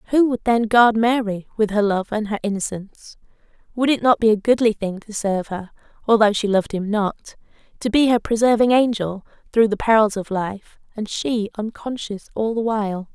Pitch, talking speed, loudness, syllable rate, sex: 215 Hz, 190 wpm, -20 LUFS, 5.4 syllables/s, female